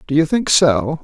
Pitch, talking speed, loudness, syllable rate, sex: 150 Hz, 235 wpm, -15 LUFS, 4.5 syllables/s, male